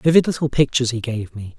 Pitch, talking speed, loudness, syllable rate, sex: 130 Hz, 225 wpm, -19 LUFS, 6.5 syllables/s, male